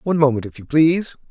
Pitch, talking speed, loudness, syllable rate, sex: 145 Hz, 230 wpm, -18 LUFS, 7.3 syllables/s, male